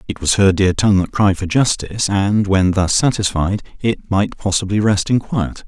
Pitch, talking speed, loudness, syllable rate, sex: 100 Hz, 200 wpm, -16 LUFS, 4.9 syllables/s, male